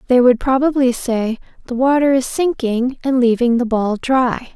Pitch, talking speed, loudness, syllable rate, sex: 250 Hz, 170 wpm, -16 LUFS, 4.5 syllables/s, female